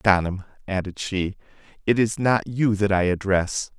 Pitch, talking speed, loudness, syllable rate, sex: 100 Hz, 160 wpm, -23 LUFS, 4.4 syllables/s, male